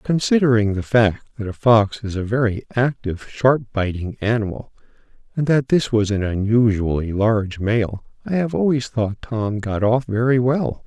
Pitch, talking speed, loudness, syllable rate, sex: 115 Hz, 165 wpm, -20 LUFS, 4.7 syllables/s, male